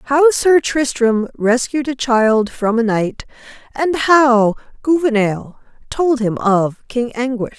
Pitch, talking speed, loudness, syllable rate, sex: 245 Hz, 135 wpm, -16 LUFS, 3.4 syllables/s, female